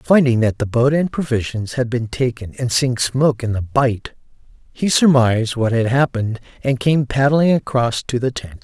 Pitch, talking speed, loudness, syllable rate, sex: 125 Hz, 190 wpm, -18 LUFS, 4.9 syllables/s, male